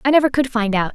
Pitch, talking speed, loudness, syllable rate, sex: 245 Hz, 315 wpm, -18 LUFS, 7.1 syllables/s, female